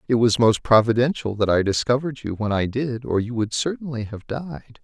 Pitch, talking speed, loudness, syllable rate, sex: 120 Hz, 210 wpm, -22 LUFS, 5.4 syllables/s, male